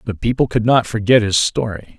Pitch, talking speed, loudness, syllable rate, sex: 110 Hz, 210 wpm, -16 LUFS, 5.3 syllables/s, male